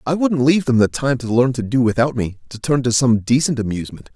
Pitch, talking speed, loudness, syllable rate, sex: 125 Hz, 260 wpm, -17 LUFS, 6.1 syllables/s, male